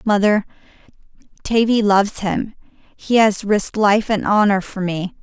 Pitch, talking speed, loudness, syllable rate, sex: 205 Hz, 140 wpm, -17 LUFS, 4.3 syllables/s, female